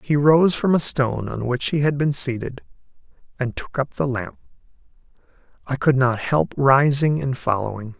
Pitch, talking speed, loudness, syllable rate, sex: 135 Hz, 175 wpm, -20 LUFS, 4.8 syllables/s, male